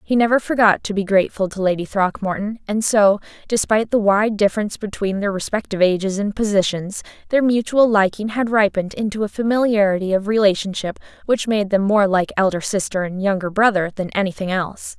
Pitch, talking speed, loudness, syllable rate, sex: 205 Hz, 175 wpm, -19 LUFS, 5.9 syllables/s, female